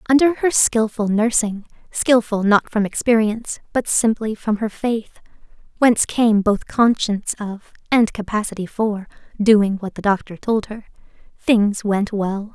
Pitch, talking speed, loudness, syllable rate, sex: 215 Hz, 135 wpm, -19 LUFS, 4.4 syllables/s, female